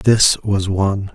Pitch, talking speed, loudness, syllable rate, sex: 100 Hz, 155 wpm, -16 LUFS, 3.6 syllables/s, male